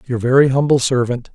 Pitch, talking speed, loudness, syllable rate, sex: 130 Hz, 180 wpm, -15 LUFS, 5.8 syllables/s, male